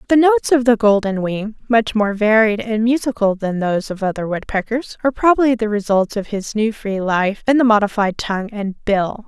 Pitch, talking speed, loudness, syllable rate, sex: 215 Hz, 190 wpm, -17 LUFS, 5.3 syllables/s, female